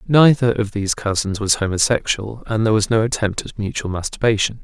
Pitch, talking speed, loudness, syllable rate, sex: 110 Hz, 180 wpm, -19 LUFS, 5.9 syllables/s, male